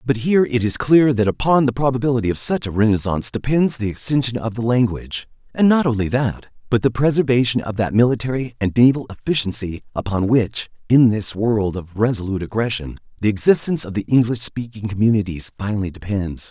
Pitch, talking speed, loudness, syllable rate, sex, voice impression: 115 Hz, 180 wpm, -19 LUFS, 5.9 syllables/s, male, very masculine, very middle-aged, very thick, slightly tensed, very powerful, dark, very soft, muffled, fluent, slightly raspy, very cool, very intellectual, sincere, very calm, very mature, friendly, very reassuring, very unique, very elegant, very wild, sweet, lively, very kind, modest